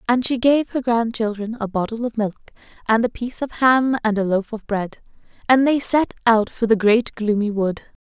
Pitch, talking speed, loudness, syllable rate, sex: 230 Hz, 210 wpm, -20 LUFS, 4.9 syllables/s, female